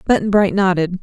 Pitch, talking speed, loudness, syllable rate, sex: 190 Hz, 175 wpm, -15 LUFS, 5.7 syllables/s, female